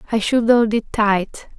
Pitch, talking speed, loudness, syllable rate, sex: 220 Hz, 190 wpm, -17 LUFS, 3.9 syllables/s, female